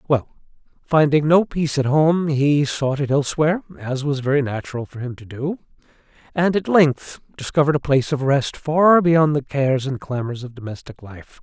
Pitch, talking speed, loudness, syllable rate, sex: 145 Hz, 185 wpm, -19 LUFS, 5.3 syllables/s, male